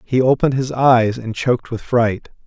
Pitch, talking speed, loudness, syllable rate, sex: 125 Hz, 195 wpm, -17 LUFS, 4.9 syllables/s, male